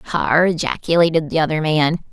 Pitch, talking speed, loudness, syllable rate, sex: 160 Hz, 140 wpm, -17 LUFS, 5.2 syllables/s, female